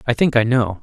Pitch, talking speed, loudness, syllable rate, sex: 120 Hz, 290 wpm, -17 LUFS, 5.8 syllables/s, male